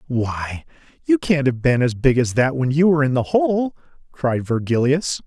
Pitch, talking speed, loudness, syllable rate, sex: 140 Hz, 195 wpm, -19 LUFS, 4.6 syllables/s, male